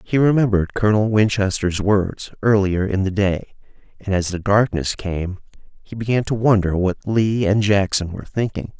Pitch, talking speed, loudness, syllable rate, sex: 100 Hz, 165 wpm, -19 LUFS, 5.0 syllables/s, male